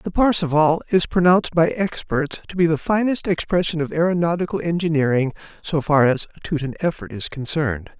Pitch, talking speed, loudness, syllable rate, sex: 160 Hz, 160 wpm, -20 LUFS, 5.6 syllables/s, male